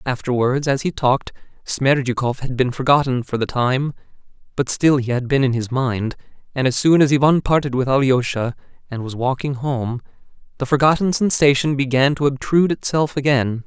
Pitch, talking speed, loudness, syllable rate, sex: 135 Hz, 170 wpm, -18 LUFS, 5.3 syllables/s, male